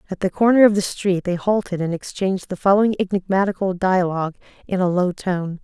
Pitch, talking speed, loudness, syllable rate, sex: 185 Hz, 190 wpm, -20 LUFS, 5.9 syllables/s, female